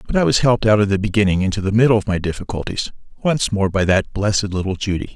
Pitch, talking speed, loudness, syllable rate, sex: 105 Hz, 245 wpm, -18 LUFS, 6.8 syllables/s, male